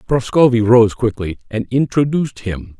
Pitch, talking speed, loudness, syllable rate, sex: 120 Hz, 130 wpm, -16 LUFS, 4.8 syllables/s, male